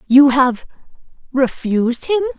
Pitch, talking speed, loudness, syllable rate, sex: 265 Hz, 75 wpm, -16 LUFS, 4.4 syllables/s, female